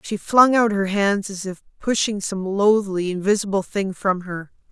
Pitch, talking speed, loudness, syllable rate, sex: 200 Hz, 180 wpm, -20 LUFS, 4.5 syllables/s, female